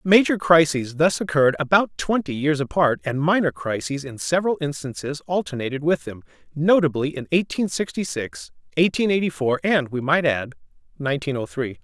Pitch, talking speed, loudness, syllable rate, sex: 150 Hz, 160 wpm, -22 LUFS, 5.3 syllables/s, male